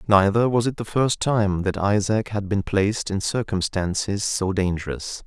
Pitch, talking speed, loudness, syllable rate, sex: 100 Hz, 170 wpm, -22 LUFS, 4.5 syllables/s, male